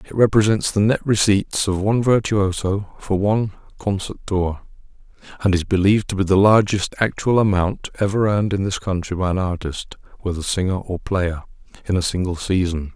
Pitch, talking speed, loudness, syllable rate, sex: 95 Hz, 170 wpm, -20 LUFS, 5.4 syllables/s, male